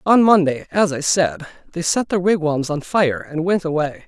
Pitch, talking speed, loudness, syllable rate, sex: 165 Hz, 205 wpm, -18 LUFS, 4.8 syllables/s, male